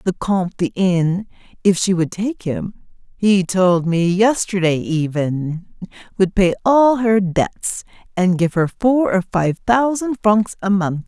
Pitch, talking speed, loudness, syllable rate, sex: 195 Hz, 155 wpm, -17 LUFS, 3.7 syllables/s, female